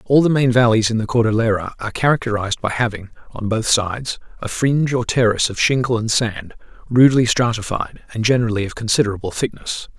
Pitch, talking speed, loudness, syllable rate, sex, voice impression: 115 Hz, 175 wpm, -18 LUFS, 6.3 syllables/s, male, very masculine, very adult-like, thick, cool, sincere, calm, slightly mature, reassuring